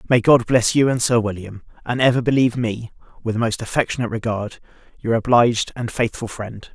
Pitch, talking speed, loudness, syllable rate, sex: 115 Hz, 185 wpm, -19 LUFS, 5.9 syllables/s, male